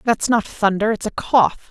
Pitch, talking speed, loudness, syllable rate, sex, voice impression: 215 Hz, 210 wpm, -18 LUFS, 4.8 syllables/s, female, very feminine, slightly young, thin, tensed, very powerful, bright, slightly soft, clear, very fluent, raspy, cool, slightly intellectual, very refreshing, slightly sincere, slightly calm, slightly friendly, slightly reassuring, very unique, slightly elegant, wild, slightly sweet, very lively, slightly strict, intense, sharp, light